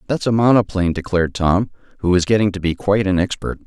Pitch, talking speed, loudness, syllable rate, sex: 95 Hz, 215 wpm, -18 LUFS, 6.8 syllables/s, male